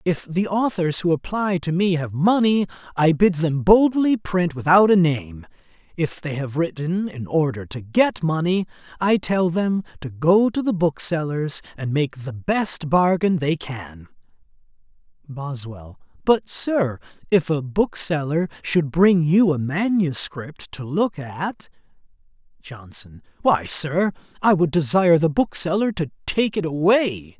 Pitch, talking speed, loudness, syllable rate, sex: 165 Hz, 145 wpm, -21 LUFS, 4.0 syllables/s, male